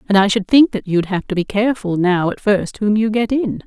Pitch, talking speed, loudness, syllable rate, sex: 205 Hz, 280 wpm, -16 LUFS, 5.5 syllables/s, female